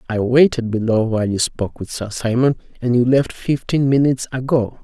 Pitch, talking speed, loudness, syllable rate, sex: 120 Hz, 185 wpm, -18 LUFS, 5.5 syllables/s, male